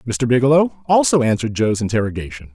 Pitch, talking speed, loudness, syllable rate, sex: 120 Hz, 140 wpm, -17 LUFS, 6.6 syllables/s, male